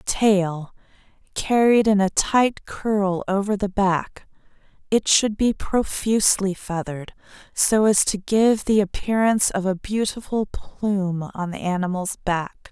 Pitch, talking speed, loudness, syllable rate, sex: 200 Hz, 125 wpm, -21 LUFS, 4.0 syllables/s, female